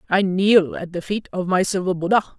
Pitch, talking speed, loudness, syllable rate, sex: 185 Hz, 225 wpm, -20 LUFS, 5.4 syllables/s, female